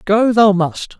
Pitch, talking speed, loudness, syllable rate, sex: 200 Hz, 180 wpm, -14 LUFS, 3.4 syllables/s, male